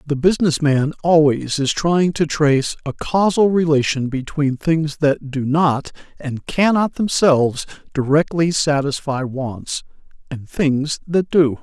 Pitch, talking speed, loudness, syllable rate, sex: 150 Hz, 135 wpm, -18 LUFS, 4.0 syllables/s, male